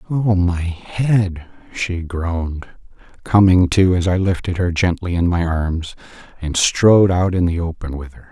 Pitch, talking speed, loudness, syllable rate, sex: 90 Hz, 165 wpm, -17 LUFS, 4.2 syllables/s, male